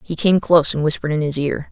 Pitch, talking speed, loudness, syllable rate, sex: 155 Hz, 280 wpm, -17 LUFS, 6.8 syllables/s, female